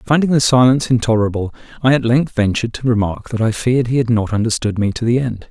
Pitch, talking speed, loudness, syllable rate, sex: 120 Hz, 230 wpm, -16 LUFS, 6.6 syllables/s, male